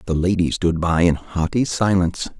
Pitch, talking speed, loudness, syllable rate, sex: 90 Hz, 175 wpm, -19 LUFS, 5.0 syllables/s, male